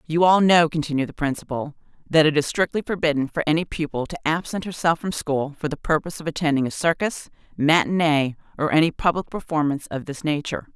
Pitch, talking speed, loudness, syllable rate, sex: 155 Hz, 190 wpm, -22 LUFS, 6.1 syllables/s, female